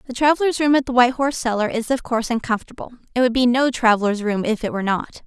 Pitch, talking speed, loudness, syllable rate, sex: 240 Hz, 250 wpm, -19 LUFS, 7.4 syllables/s, female